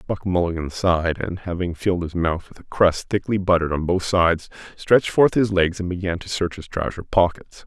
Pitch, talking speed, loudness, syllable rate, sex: 90 Hz, 210 wpm, -21 LUFS, 5.5 syllables/s, male